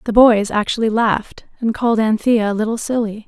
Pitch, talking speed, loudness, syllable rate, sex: 220 Hz, 185 wpm, -17 LUFS, 5.7 syllables/s, female